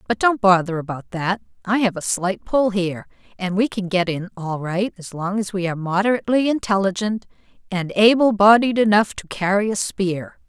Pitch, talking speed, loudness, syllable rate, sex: 200 Hz, 190 wpm, -20 LUFS, 5.3 syllables/s, female